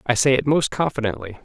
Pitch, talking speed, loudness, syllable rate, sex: 130 Hz, 210 wpm, -20 LUFS, 6.2 syllables/s, male